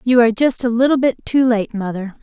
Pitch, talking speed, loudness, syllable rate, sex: 235 Hz, 240 wpm, -16 LUFS, 5.7 syllables/s, female